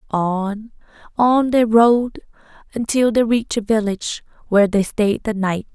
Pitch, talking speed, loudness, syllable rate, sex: 220 Hz, 145 wpm, -18 LUFS, 4.4 syllables/s, female